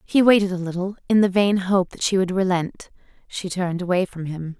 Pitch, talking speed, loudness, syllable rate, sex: 185 Hz, 220 wpm, -21 LUFS, 5.5 syllables/s, female